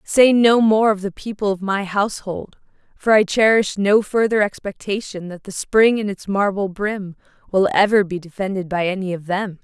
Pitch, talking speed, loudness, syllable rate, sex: 200 Hz, 185 wpm, -18 LUFS, 4.9 syllables/s, female